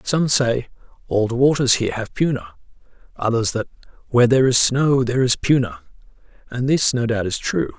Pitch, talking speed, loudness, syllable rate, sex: 125 Hz, 170 wpm, -19 LUFS, 5.7 syllables/s, male